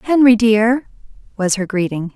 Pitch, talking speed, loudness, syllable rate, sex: 220 Hz, 140 wpm, -15 LUFS, 4.6 syllables/s, female